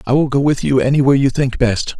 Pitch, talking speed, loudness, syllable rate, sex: 135 Hz, 270 wpm, -15 LUFS, 6.5 syllables/s, male